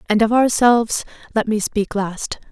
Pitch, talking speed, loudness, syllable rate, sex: 220 Hz, 165 wpm, -18 LUFS, 4.6 syllables/s, female